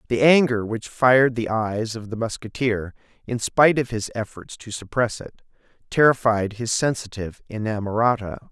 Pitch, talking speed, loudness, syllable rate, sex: 115 Hz, 150 wpm, -22 LUFS, 5.1 syllables/s, male